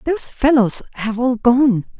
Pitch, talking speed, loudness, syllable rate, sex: 240 Hz, 150 wpm, -16 LUFS, 4.4 syllables/s, female